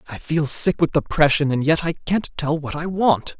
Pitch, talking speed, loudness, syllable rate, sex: 155 Hz, 230 wpm, -20 LUFS, 4.8 syllables/s, male